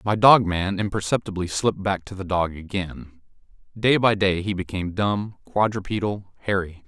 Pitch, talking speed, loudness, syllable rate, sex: 100 Hz, 155 wpm, -23 LUFS, 5.0 syllables/s, male